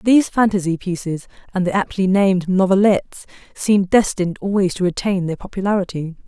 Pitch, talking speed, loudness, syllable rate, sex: 190 Hz, 145 wpm, -18 LUFS, 5.8 syllables/s, female